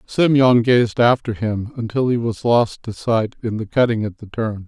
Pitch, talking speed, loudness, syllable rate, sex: 115 Hz, 205 wpm, -18 LUFS, 4.5 syllables/s, male